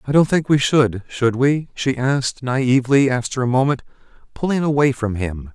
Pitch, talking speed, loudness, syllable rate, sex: 130 Hz, 185 wpm, -18 LUFS, 5.0 syllables/s, male